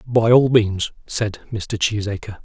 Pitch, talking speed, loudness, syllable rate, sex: 105 Hz, 150 wpm, -19 LUFS, 3.9 syllables/s, male